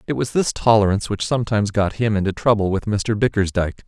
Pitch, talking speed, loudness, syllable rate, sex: 105 Hz, 200 wpm, -19 LUFS, 6.7 syllables/s, male